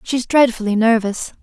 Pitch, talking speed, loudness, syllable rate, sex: 230 Hz, 125 wpm, -16 LUFS, 4.8 syllables/s, female